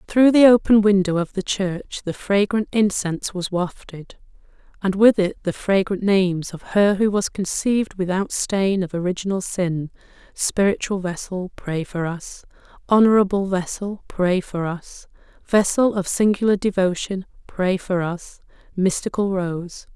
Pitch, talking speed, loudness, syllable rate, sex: 190 Hz, 140 wpm, -20 LUFS, 4.4 syllables/s, female